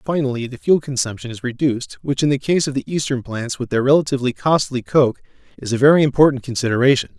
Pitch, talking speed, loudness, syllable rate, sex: 135 Hz, 200 wpm, -18 LUFS, 6.5 syllables/s, male